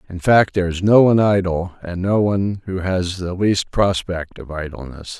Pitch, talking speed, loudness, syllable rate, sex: 90 Hz, 195 wpm, -18 LUFS, 4.9 syllables/s, male